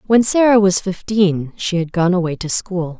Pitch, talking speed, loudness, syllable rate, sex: 190 Hz, 200 wpm, -16 LUFS, 4.6 syllables/s, female